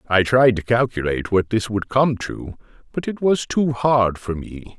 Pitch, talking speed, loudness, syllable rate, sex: 115 Hz, 200 wpm, -20 LUFS, 4.5 syllables/s, male